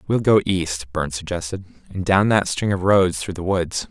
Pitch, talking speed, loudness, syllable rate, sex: 90 Hz, 215 wpm, -20 LUFS, 4.9 syllables/s, male